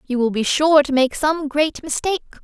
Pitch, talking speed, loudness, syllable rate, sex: 290 Hz, 220 wpm, -18 LUFS, 5.4 syllables/s, female